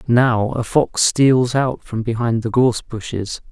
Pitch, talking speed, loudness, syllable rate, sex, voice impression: 120 Hz, 170 wpm, -18 LUFS, 4.0 syllables/s, male, masculine, adult-like, slightly relaxed, slightly bright, soft, sincere, calm, friendly, reassuring, slightly wild, slightly lively, kind